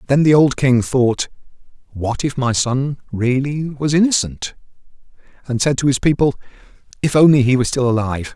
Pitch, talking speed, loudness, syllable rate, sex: 130 Hz, 165 wpm, -17 LUFS, 5.3 syllables/s, male